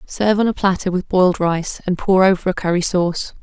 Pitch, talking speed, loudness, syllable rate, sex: 185 Hz, 230 wpm, -17 LUFS, 5.9 syllables/s, female